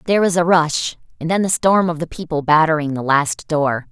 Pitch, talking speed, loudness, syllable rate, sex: 160 Hz, 230 wpm, -17 LUFS, 5.4 syllables/s, female